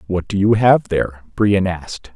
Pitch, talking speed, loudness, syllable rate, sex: 95 Hz, 195 wpm, -17 LUFS, 4.7 syllables/s, male